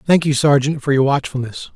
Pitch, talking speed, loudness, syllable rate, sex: 140 Hz, 205 wpm, -16 LUFS, 5.6 syllables/s, male